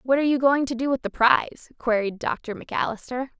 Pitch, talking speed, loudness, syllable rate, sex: 250 Hz, 210 wpm, -23 LUFS, 5.9 syllables/s, female